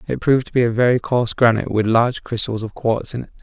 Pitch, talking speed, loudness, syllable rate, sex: 115 Hz, 260 wpm, -18 LUFS, 6.9 syllables/s, male